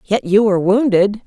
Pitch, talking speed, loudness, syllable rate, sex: 205 Hz, 190 wpm, -14 LUFS, 5.1 syllables/s, female